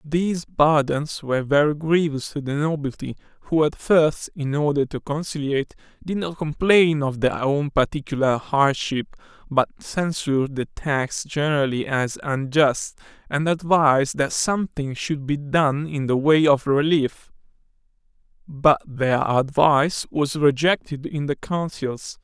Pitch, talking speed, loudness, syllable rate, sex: 145 Hz, 135 wpm, -21 LUFS, 4.3 syllables/s, male